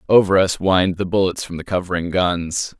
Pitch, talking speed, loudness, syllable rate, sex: 90 Hz, 195 wpm, -19 LUFS, 5.4 syllables/s, male